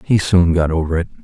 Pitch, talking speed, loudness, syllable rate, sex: 85 Hz, 245 wpm, -16 LUFS, 5.9 syllables/s, male